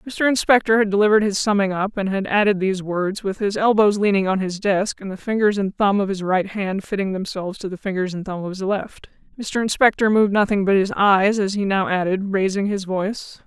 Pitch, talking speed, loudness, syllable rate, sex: 200 Hz, 230 wpm, -20 LUFS, 5.7 syllables/s, female